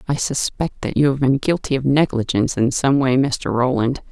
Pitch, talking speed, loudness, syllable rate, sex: 135 Hz, 205 wpm, -19 LUFS, 5.1 syllables/s, female